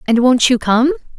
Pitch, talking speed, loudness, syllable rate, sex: 240 Hz, 205 wpm, -13 LUFS, 5.1 syllables/s, female